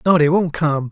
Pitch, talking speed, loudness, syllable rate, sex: 160 Hz, 260 wpm, -17 LUFS, 5.1 syllables/s, male